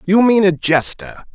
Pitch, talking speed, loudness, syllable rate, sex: 175 Hz, 180 wpm, -14 LUFS, 4.5 syllables/s, male